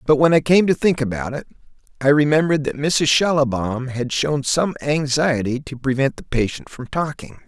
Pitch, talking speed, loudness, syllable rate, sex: 140 Hz, 185 wpm, -19 LUFS, 5.1 syllables/s, male